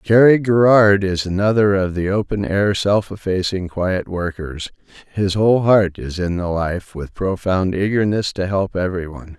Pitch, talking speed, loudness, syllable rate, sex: 95 Hz, 160 wpm, -18 LUFS, 4.5 syllables/s, male